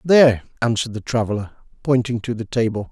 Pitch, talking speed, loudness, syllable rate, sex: 115 Hz, 165 wpm, -20 LUFS, 6.3 syllables/s, male